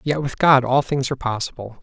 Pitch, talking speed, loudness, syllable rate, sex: 130 Hz, 230 wpm, -19 LUFS, 5.9 syllables/s, male